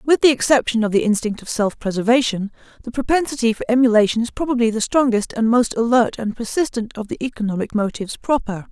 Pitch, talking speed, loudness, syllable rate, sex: 235 Hz, 185 wpm, -19 LUFS, 6.2 syllables/s, female